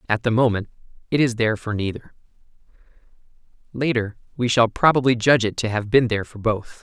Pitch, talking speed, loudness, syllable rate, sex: 115 Hz, 175 wpm, -21 LUFS, 6.3 syllables/s, male